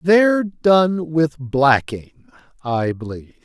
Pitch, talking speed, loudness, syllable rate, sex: 150 Hz, 105 wpm, -18 LUFS, 3.4 syllables/s, male